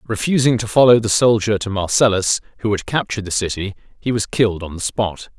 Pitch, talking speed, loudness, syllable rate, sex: 105 Hz, 200 wpm, -18 LUFS, 5.9 syllables/s, male